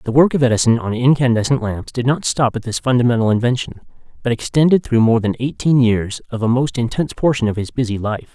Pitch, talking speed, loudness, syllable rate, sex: 120 Hz, 215 wpm, -17 LUFS, 6.1 syllables/s, male